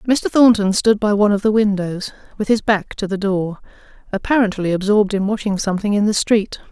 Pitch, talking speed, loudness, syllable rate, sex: 205 Hz, 195 wpm, -17 LUFS, 5.8 syllables/s, female